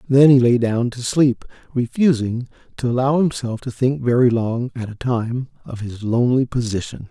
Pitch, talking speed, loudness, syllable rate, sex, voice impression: 125 Hz, 175 wpm, -19 LUFS, 4.9 syllables/s, male, masculine, middle-aged, slightly relaxed, slightly weak, soft, slightly raspy, cool, calm, slightly mature, friendly, reassuring, wild, kind, modest